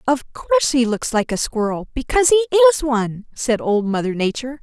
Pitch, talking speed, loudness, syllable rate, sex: 245 Hz, 195 wpm, -18 LUFS, 5.8 syllables/s, female